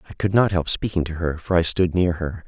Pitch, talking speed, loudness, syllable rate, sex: 85 Hz, 290 wpm, -21 LUFS, 5.9 syllables/s, male